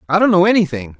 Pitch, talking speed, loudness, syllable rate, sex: 170 Hz, 240 wpm, -14 LUFS, 7.4 syllables/s, male